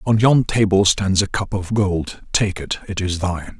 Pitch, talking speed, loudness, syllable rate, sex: 100 Hz, 215 wpm, -19 LUFS, 4.6 syllables/s, male